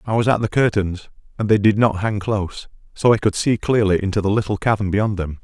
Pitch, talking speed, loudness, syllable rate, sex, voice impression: 105 Hz, 245 wpm, -19 LUFS, 5.9 syllables/s, male, masculine, adult-like, slightly dark, clear, slightly fluent, cool, sincere, slightly mature, reassuring, wild, kind, slightly modest